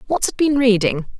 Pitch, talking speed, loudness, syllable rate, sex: 230 Hz, 200 wpm, -17 LUFS, 5.5 syllables/s, female